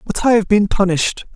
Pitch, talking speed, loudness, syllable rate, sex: 200 Hz, 220 wpm, -16 LUFS, 5.8 syllables/s, male